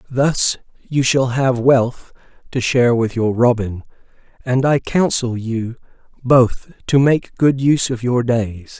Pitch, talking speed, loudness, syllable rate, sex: 125 Hz, 150 wpm, -17 LUFS, 3.8 syllables/s, male